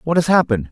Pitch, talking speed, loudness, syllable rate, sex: 140 Hz, 250 wpm, -16 LUFS, 8.2 syllables/s, male